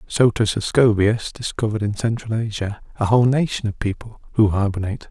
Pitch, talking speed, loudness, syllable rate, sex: 110 Hz, 155 wpm, -20 LUFS, 5.8 syllables/s, male